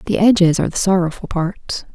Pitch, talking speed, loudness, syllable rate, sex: 180 Hz, 185 wpm, -17 LUFS, 5.8 syllables/s, female